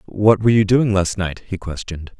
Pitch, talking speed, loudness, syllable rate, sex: 100 Hz, 220 wpm, -18 LUFS, 5.6 syllables/s, male